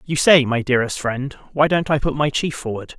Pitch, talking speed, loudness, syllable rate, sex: 140 Hz, 240 wpm, -19 LUFS, 5.6 syllables/s, male